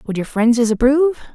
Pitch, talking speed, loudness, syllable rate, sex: 250 Hz, 180 wpm, -16 LUFS, 6.6 syllables/s, female